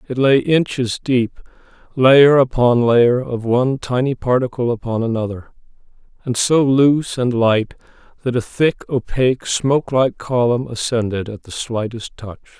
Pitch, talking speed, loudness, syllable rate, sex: 125 Hz, 145 wpm, -17 LUFS, 4.6 syllables/s, male